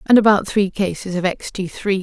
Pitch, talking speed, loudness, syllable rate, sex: 195 Hz, 205 wpm, -19 LUFS, 5.1 syllables/s, female